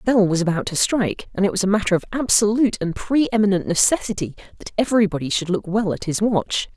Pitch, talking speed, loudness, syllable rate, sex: 200 Hz, 220 wpm, -20 LUFS, 6.6 syllables/s, female